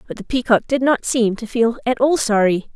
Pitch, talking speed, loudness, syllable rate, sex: 235 Hz, 240 wpm, -18 LUFS, 5.3 syllables/s, female